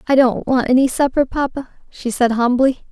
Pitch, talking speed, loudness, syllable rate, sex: 255 Hz, 185 wpm, -17 LUFS, 5.2 syllables/s, female